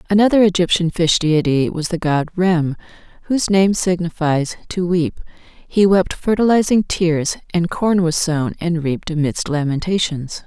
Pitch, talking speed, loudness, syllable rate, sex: 170 Hz, 145 wpm, -17 LUFS, 4.5 syllables/s, female